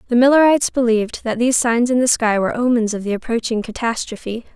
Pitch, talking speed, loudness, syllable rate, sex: 235 Hz, 195 wpm, -17 LUFS, 6.5 syllables/s, female